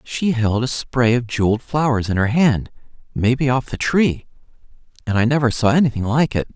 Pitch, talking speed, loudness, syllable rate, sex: 125 Hz, 190 wpm, -18 LUFS, 5.4 syllables/s, male